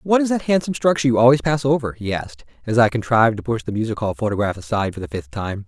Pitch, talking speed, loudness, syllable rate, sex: 120 Hz, 265 wpm, -20 LUFS, 7.3 syllables/s, male